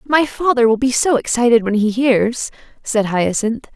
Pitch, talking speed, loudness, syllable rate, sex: 240 Hz, 175 wpm, -16 LUFS, 4.5 syllables/s, female